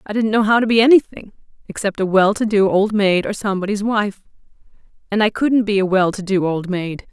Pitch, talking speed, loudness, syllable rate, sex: 205 Hz, 220 wpm, -17 LUFS, 5.7 syllables/s, female